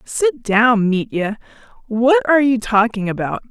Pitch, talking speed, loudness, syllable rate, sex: 235 Hz, 135 wpm, -16 LUFS, 4.2 syllables/s, female